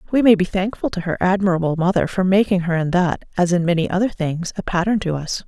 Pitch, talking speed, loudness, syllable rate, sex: 185 Hz, 240 wpm, -19 LUFS, 6.1 syllables/s, female